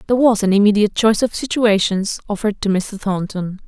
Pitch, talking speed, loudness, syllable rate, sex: 205 Hz, 180 wpm, -17 LUFS, 6.2 syllables/s, female